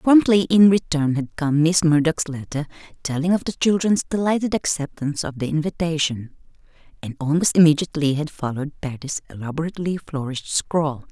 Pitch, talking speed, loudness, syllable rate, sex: 155 Hz, 140 wpm, -21 LUFS, 5.6 syllables/s, female